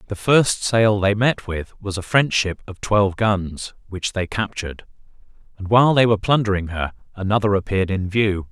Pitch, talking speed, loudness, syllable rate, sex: 100 Hz, 185 wpm, -20 LUFS, 5.1 syllables/s, male